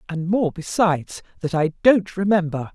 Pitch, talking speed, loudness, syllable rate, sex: 180 Hz, 155 wpm, -21 LUFS, 4.6 syllables/s, female